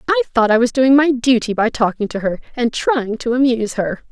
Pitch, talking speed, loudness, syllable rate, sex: 240 Hz, 235 wpm, -16 LUFS, 5.6 syllables/s, female